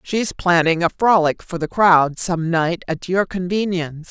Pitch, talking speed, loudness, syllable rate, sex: 175 Hz, 175 wpm, -18 LUFS, 4.3 syllables/s, female